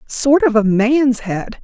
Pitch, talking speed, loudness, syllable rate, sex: 245 Hz, 185 wpm, -15 LUFS, 3.4 syllables/s, female